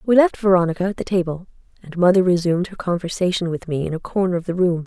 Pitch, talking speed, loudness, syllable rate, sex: 180 Hz, 235 wpm, -20 LUFS, 6.8 syllables/s, female